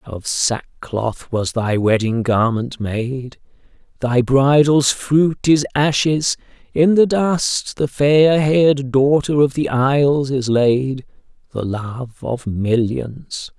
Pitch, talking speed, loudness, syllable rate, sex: 130 Hz, 125 wpm, -17 LUFS, 3.1 syllables/s, male